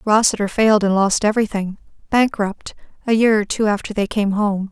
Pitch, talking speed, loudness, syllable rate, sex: 210 Hz, 155 wpm, -18 LUFS, 5.6 syllables/s, female